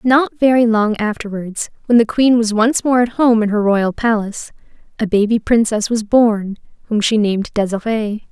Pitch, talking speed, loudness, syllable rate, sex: 220 Hz, 180 wpm, -16 LUFS, 4.8 syllables/s, female